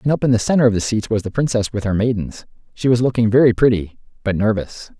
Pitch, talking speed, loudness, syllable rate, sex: 115 Hz, 250 wpm, -18 LUFS, 6.5 syllables/s, male